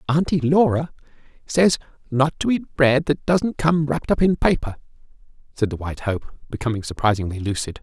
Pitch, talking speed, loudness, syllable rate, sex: 140 Hz, 160 wpm, -21 LUFS, 5.5 syllables/s, male